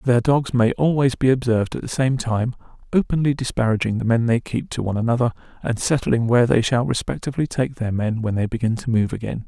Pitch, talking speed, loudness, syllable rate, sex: 120 Hz, 215 wpm, -21 LUFS, 6.1 syllables/s, male